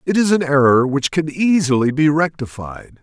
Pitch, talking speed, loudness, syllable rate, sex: 150 Hz, 180 wpm, -16 LUFS, 4.9 syllables/s, male